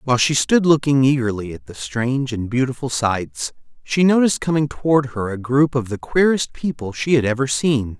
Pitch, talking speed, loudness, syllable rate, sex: 130 Hz, 195 wpm, -19 LUFS, 5.3 syllables/s, male